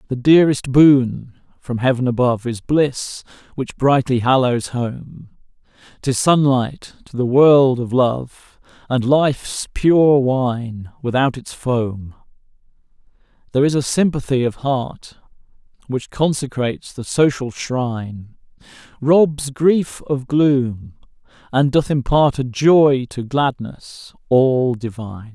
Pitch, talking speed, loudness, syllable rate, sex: 130 Hz, 120 wpm, -17 LUFS, 3.6 syllables/s, male